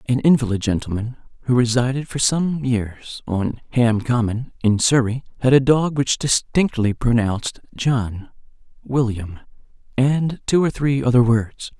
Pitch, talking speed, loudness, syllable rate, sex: 125 Hz, 135 wpm, -19 LUFS, 4.3 syllables/s, male